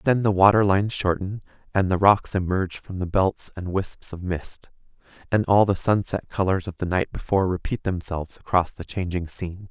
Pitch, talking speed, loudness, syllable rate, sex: 95 Hz, 190 wpm, -23 LUFS, 5.3 syllables/s, male